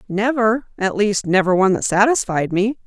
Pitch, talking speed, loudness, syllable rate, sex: 210 Hz, 165 wpm, -18 LUFS, 5.0 syllables/s, female